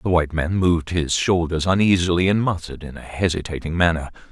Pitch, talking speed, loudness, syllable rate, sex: 85 Hz, 180 wpm, -20 LUFS, 6.2 syllables/s, male